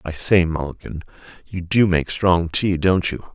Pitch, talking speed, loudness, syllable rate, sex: 85 Hz, 195 wpm, -19 LUFS, 4.7 syllables/s, male